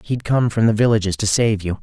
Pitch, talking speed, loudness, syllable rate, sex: 110 Hz, 265 wpm, -18 LUFS, 5.8 syllables/s, male